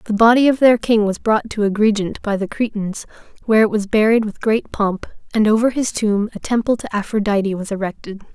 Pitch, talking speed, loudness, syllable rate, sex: 215 Hz, 210 wpm, -17 LUFS, 5.7 syllables/s, female